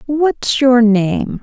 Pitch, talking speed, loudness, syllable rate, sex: 250 Hz, 125 wpm, -13 LUFS, 2.3 syllables/s, female